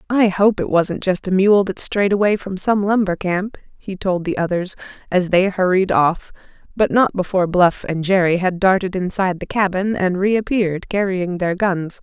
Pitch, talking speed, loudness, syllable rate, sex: 190 Hz, 190 wpm, -18 LUFS, 4.8 syllables/s, female